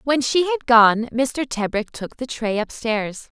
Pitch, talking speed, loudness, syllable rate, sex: 240 Hz, 175 wpm, -20 LUFS, 4.1 syllables/s, female